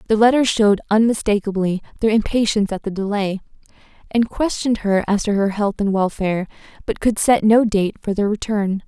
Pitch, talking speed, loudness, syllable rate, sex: 210 Hz, 175 wpm, -18 LUFS, 5.7 syllables/s, female